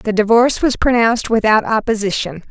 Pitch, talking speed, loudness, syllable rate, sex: 225 Hz, 145 wpm, -15 LUFS, 5.8 syllables/s, female